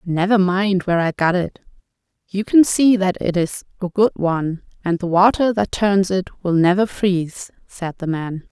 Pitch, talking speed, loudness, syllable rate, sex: 185 Hz, 190 wpm, -18 LUFS, 4.7 syllables/s, female